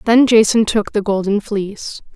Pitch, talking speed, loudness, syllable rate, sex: 210 Hz, 165 wpm, -15 LUFS, 4.7 syllables/s, female